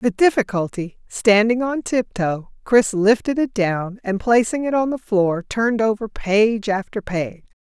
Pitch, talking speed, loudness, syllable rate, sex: 215 Hz, 155 wpm, -19 LUFS, 4.2 syllables/s, female